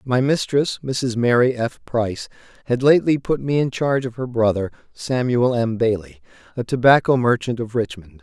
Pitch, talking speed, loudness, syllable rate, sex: 120 Hz, 170 wpm, -20 LUFS, 5.1 syllables/s, male